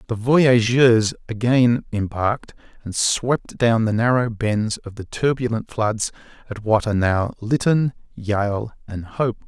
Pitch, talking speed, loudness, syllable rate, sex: 115 Hz, 140 wpm, -20 LUFS, 3.9 syllables/s, male